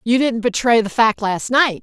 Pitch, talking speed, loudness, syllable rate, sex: 230 Hz, 230 wpm, -17 LUFS, 4.6 syllables/s, female